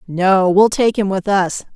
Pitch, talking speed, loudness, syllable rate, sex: 195 Hz, 205 wpm, -15 LUFS, 3.9 syllables/s, female